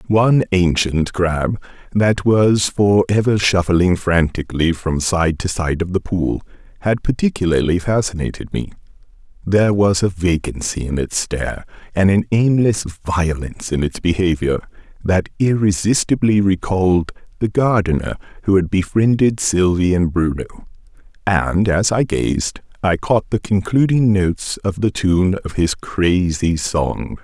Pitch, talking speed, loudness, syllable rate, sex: 95 Hz, 135 wpm, -17 LUFS, 4.3 syllables/s, male